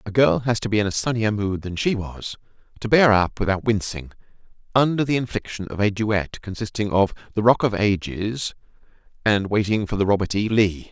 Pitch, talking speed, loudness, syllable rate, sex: 105 Hz, 200 wpm, -22 LUFS, 5.3 syllables/s, male